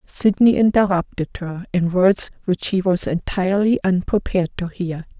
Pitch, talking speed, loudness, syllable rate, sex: 190 Hz, 140 wpm, -19 LUFS, 4.8 syllables/s, female